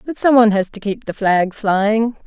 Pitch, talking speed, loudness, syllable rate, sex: 215 Hz, 240 wpm, -16 LUFS, 4.8 syllables/s, female